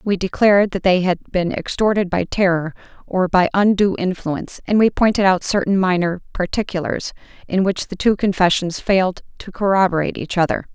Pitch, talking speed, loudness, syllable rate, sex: 185 Hz, 170 wpm, -18 LUFS, 5.5 syllables/s, female